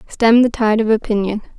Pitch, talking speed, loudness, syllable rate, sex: 220 Hz, 190 wpm, -15 LUFS, 5.3 syllables/s, female